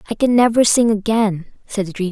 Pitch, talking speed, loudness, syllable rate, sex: 215 Hz, 225 wpm, -16 LUFS, 5.7 syllables/s, female